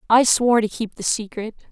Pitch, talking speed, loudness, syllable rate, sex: 225 Hz, 210 wpm, -19 LUFS, 5.7 syllables/s, female